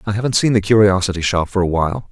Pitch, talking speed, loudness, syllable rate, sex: 100 Hz, 255 wpm, -16 LUFS, 7.0 syllables/s, male